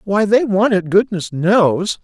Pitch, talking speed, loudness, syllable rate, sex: 200 Hz, 175 wpm, -15 LUFS, 3.6 syllables/s, male